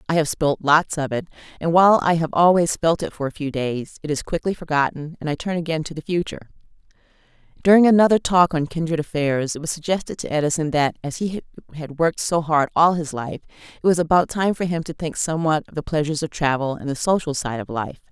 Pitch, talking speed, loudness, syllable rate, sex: 160 Hz, 230 wpm, -21 LUFS, 6.2 syllables/s, female